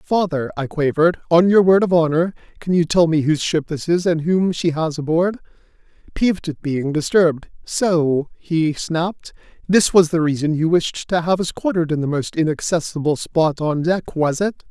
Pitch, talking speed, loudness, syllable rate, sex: 165 Hz, 190 wpm, -18 LUFS, 5.0 syllables/s, male